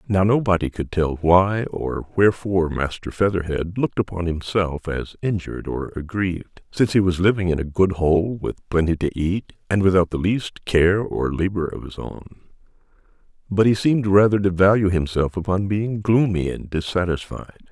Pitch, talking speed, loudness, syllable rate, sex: 95 Hz, 170 wpm, -21 LUFS, 5.0 syllables/s, male